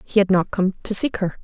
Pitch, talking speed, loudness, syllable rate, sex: 195 Hz, 290 wpm, -19 LUFS, 5.7 syllables/s, female